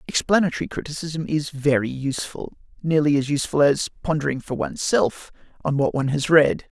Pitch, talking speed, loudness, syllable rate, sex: 145 Hz, 150 wpm, -22 LUFS, 5.8 syllables/s, male